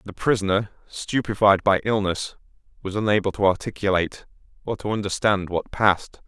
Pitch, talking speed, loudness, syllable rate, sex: 100 Hz, 135 wpm, -22 LUFS, 5.5 syllables/s, male